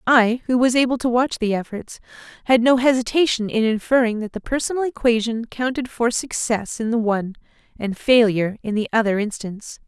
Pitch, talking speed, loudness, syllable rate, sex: 235 Hz, 175 wpm, -20 LUFS, 5.6 syllables/s, female